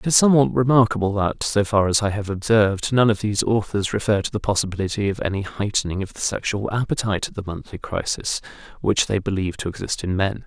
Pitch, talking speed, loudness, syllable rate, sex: 105 Hz, 210 wpm, -21 LUFS, 6.3 syllables/s, male